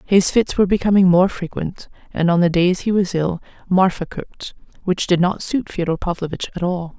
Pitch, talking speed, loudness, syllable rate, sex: 180 Hz, 195 wpm, -19 LUFS, 5.3 syllables/s, female